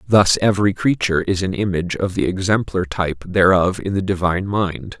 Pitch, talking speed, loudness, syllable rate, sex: 95 Hz, 180 wpm, -18 LUFS, 5.6 syllables/s, male